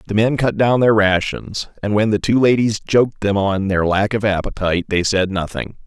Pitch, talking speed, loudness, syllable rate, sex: 105 Hz, 215 wpm, -17 LUFS, 5.2 syllables/s, male